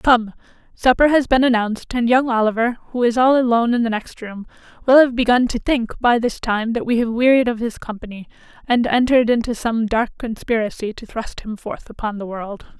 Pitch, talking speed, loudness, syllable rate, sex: 235 Hz, 205 wpm, -18 LUFS, 5.4 syllables/s, female